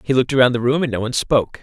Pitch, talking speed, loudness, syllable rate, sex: 125 Hz, 330 wpm, -17 LUFS, 8.5 syllables/s, male